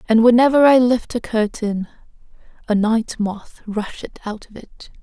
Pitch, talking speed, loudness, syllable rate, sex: 230 Hz, 155 wpm, -17 LUFS, 4.4 syllables/s, female